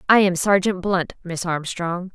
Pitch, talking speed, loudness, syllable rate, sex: 180 Hz, 170 wpm, -21 LUFS, 4.2 syllables/s, female